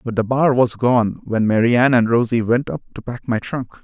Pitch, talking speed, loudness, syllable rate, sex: 120 Hz, 250 wpm, -17 LUFS, 5.4 syllables/s, male